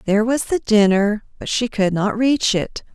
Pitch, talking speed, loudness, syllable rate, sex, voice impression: 220 Hz, 205 wpm, -18 LUFS, 4.6 syllables/s, female, feminine, adult-like, tensed, powerful, bright, clear, friendly, elegant, lively, slightly intense, slightly sharp